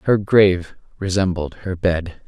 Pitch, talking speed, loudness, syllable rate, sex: 90 Hz, 130 wpm, -19 LUFS, 4.2 syllables/s, male